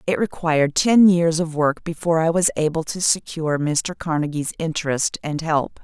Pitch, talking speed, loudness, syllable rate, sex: 160 Hz, 175 wpm, -20 LUFS, 5.1 syllables/s, female